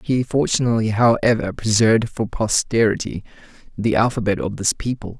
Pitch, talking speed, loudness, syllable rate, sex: 110 Hz, 125 wpm, -19 LUFS, 5.5 syllables/s, male